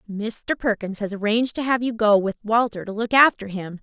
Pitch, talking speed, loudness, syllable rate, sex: 220 Hz, 220 wpm, -21 LUFS, 5.3 syllables/s, female